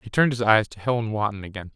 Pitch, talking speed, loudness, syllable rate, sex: 110 Hz, 275 wpm, -22 LUFS, 7.0 syllables/s, male